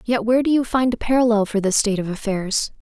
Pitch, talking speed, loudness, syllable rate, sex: 225 Hz, 255 wpm, -19 LUFS, 6.4 syllables/s, female